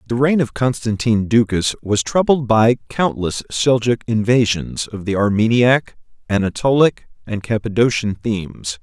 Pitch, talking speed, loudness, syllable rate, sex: 115 Hz, 120 wpm, -17 LUFS, 4.8 syllables/s, male